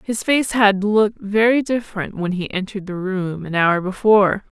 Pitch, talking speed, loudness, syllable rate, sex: 200 Hz, 185 wpm, -18 LUFS, 5.0 syllables/s, female